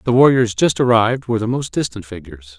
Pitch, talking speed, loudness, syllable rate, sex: 110 Hz, 210 wpm, -16 LUFS, 6.5 syllables/s, male